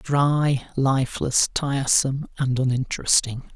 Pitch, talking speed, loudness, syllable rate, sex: 135 Hz, 85 wpm, -22 LUFS, 4.3 syllables/s, male